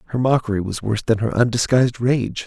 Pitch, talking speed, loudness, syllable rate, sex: 115 Hz, 195 wpm, -19 LUFS, 6.4 syllables/s, male